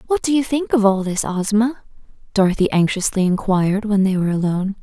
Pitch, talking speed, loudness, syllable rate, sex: 205 Hz, 185 wpm, -18 LUFS, 6.1 syllables/s, female